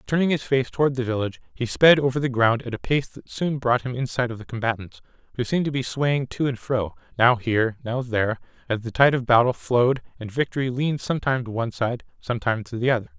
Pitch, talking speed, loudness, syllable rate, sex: 125 Hz, 225 wpm, -23 LUFS, 6.5 syllables/s, male